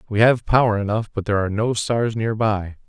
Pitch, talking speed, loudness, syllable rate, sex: 110 Hz, 210 wpm, -20 LUFS, 5.8 syllables/s, male